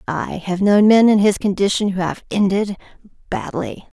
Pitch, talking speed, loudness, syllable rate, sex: 195 Hz, 165 wpm, -17 LUFS, 4.7 syllables/s, female